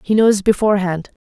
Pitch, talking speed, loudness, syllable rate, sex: 200 Hz, 140 wpm, -16 LUFS, 5.8 syllables/s, female